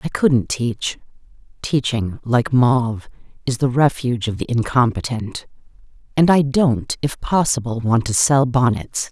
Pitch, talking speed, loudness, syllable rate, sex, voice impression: 125 Hz, 140 wpm, -18 LUFS, 3.8 syllables/s, female, very feminine, middle-aged, intellectual, slightly calm, slightly elegant